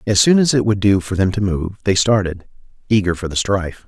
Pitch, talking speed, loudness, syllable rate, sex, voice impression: 100 Hz, 250 wpm, -17 LUFS, 5.8 syllables/s, male, masculine, adult-like, slightly thick, fluent, cool, sincere, slightly calm, slightly kind